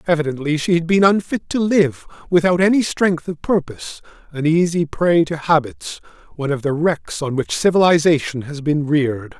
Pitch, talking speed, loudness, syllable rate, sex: 160 Hz, 170 wpm, -18 LUFS, 5.2 syllables/s, male